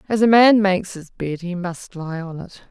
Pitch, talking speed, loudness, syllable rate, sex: 185 Hz, 245 wpm, -18 LUFS, 5.0 syllables/s, female